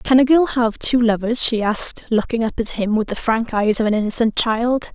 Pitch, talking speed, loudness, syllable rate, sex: 230 Hz, 245 wpm, -18 LUFS, 5.3 syllables/s, female